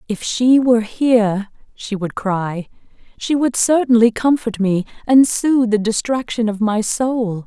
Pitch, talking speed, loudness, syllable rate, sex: 225 Hz, 155 wpm, -17 LUFS, 4.1 syllables/s, female